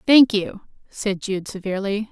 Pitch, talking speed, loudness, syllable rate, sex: 205 Hz, 140 wpm, -21 LUFS, 4.6 syllables/s, female